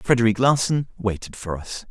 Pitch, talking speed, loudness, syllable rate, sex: 115 Hz, 155 wpm, -22 LUFS, 5.4 syllables/s, male